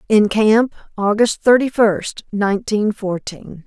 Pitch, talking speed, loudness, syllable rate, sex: 210 Hz, 115 wpm, -17 LUFS, 3.7 syllables/s, female